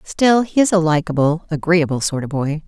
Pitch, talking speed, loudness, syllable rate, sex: 165 Hz, 180 wpm, -17 LUFS, 4.7 syllables/s, female